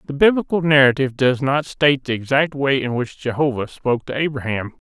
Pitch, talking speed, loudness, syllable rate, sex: 135 Hz, 185 wpm, -19 LUFS, 5.8 syllables/s, male